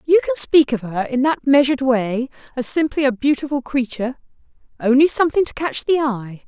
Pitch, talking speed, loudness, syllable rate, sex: 265 Hz, 175 wpm, -18 LUFS, 5.6 syllables/s, female